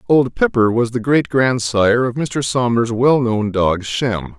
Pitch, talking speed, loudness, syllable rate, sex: 120 Hz, 165 wpm, -16 LUFS, 4.0 syllables/s, male